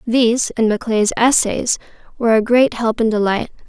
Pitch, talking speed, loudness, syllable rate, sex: 230 Hz, 165 wpm, -16 LUFS, 5.4 syllables/s, female